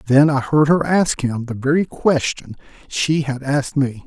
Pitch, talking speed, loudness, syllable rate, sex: 140 Hz, 190 wpm, -18 LUFS, 4.5 syllables/s, male